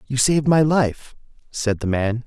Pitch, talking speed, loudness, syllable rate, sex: 130 Hz, 185 wpm, -19 LUFS, 4.5 syllables/s, male